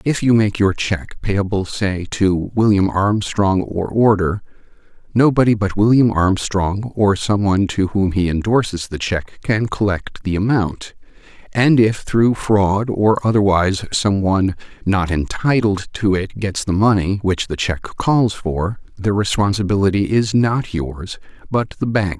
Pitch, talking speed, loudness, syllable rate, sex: 100 Hz, 155 wpm, -17 LUFS, 4.2 syllables/s, male